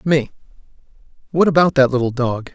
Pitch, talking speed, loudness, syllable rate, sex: 140 Hz, 140 wpm, -17 LUFS, 5.6 syllables/s, male